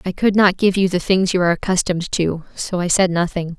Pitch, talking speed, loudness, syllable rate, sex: 180 Hz, 250 wpm, -18 LUFS, 5.9 syllables/s, female